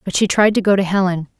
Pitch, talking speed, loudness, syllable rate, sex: 190 Hz, 300 wpm, -16 LUFS, 6.6 syllables/s, female